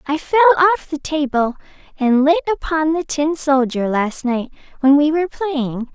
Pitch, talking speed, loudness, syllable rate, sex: 290 Hz, 170 wpm, -17 LUFS, 5.0 syllables/s, female